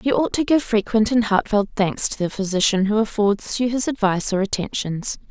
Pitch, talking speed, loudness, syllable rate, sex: 215 Hz, 205 wpm, -20 LUFS, 5.4 syllables/s, female